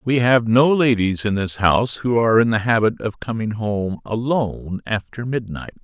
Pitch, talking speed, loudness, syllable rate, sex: 115 Hz, 185 wpm, -19 LUFS, 5.0 syllables/s, male